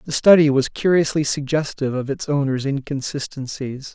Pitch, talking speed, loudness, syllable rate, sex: 140 Hz, 135 wpm, -20 LUFS, 5.3 syllables/s, male